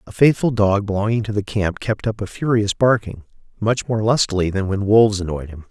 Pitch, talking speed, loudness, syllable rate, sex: 105 Hz, 210 wpm, -19 LUFS, 5.6 syllables/s, male